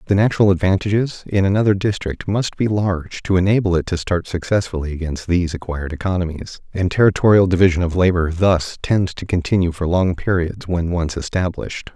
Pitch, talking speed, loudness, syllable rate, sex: 90 Hz, 170 wpm, -18 LUFS, 5.9 syllables/s, male